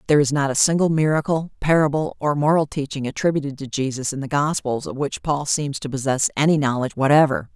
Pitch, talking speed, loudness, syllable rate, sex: 145 Hz, 200 wpm, -20 LUFS, 6.2 syllables/s, female